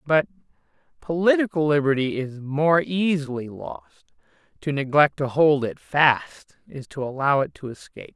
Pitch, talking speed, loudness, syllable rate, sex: 150 Hz, 140 wpm, -22 LUFS, 4.6 syllables/s, male